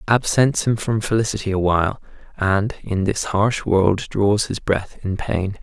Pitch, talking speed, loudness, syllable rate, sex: 100 Hz, 170 wpm, -20 LUFS, 4.2 syllables/s, male